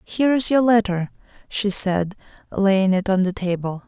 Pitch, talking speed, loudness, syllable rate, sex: 200 Hz, 170 wpm, -20 LUFS, 4.6 syllables/s, female